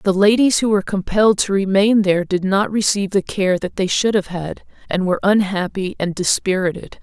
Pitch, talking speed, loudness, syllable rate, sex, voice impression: 195 Hz, 195 wpm, -17 LUFS, 5.5 syllables/s, female, feminine, very adult-like, slightly thick, very tensed, very powerful, slightly dark, slightly soft, clear, fluent, very cool, intellectual, refreshing, sincere, very calm, slightly friendly, reassuring, very unique, very elegant, wild, sweet, lively, kind, slightly intense